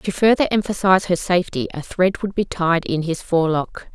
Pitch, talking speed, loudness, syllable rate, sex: 180 Hz, 200 wpm, -19 LUFS, 5.6 syllables/s, female